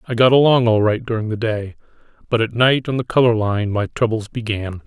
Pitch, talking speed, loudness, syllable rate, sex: 115 Hz, 220 wpm, -18 LUFS, 5.5 syllables/s, male